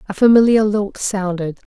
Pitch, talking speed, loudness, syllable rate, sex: 200 Hz, 140 wpm, -16 LUFS, 4.8 syllables/s, female